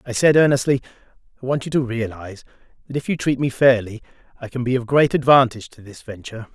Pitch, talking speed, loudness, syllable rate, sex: 125 Hz, 210 wpm, -19 LUFS, 6.7 syllables/s, male